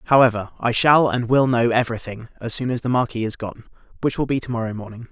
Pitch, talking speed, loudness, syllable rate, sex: 120 Hz, 245 wpm, -20 LUFS, 6.2 syllables/s, male